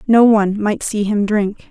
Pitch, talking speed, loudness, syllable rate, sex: 210 Hz, 210 wpm, -15 LUFS, 4.5 syllables/s, female